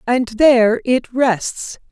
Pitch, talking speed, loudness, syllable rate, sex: 250 Hz, 125 wpm, -15 LUFS, 3.0 syllables/s, female